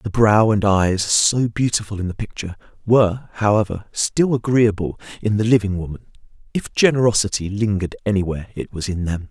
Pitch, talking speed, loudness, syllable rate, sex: 105 Hz, 160 wpm, -19 LUFS, 5.7 syllables/s, male